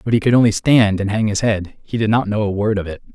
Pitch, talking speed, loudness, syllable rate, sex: 105 Hz, 325 wpm, -17 LUFS, 6.2 syllables/s, male